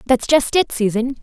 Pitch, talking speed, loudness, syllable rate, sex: 255 Hz, 195 wpm, -17 LUFS, 4.9 syllables/s, female